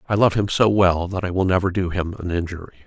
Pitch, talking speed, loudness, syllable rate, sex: 95 Hz, 270 wpm, -20 LUFS, 6.3 syllables/s, male